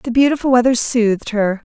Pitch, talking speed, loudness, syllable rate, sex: 235 Hz, 175 wpm, -15 LUFS, 5.6 syllables/s, female